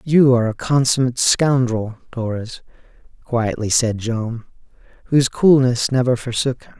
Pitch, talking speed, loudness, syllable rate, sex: 125 Hz, 125 wpm, -18 LUFS, 4.7 syllables/s, male